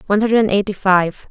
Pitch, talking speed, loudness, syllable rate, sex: 200 Hz, 185 wpm, -16 LUFS, 6.1 syllables/s, female